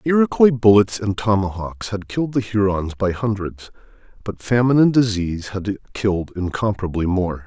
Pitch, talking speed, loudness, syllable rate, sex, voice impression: 105 Hz, 145 wpm, -19 LUFS, 5.2 syllables/s, male, masculine, adult-like, thick, tensed, powerful, soft, slightly muffled, intellectual, mature, friendly, wild, lively, slightly strict